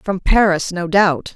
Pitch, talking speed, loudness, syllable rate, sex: 185 Hz, 175 wpm, -16 LUFS, 3.8 syllables/s, female